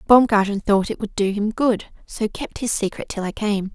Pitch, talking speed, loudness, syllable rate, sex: 210 Hz, 225 wpm, -21 LUFS, 5.0 syllables/s, female